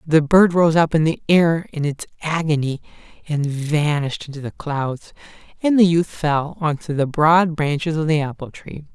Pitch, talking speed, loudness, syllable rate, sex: 155 Hz, 190 wpm, -19 LUFS, 4.6 syllables/s, male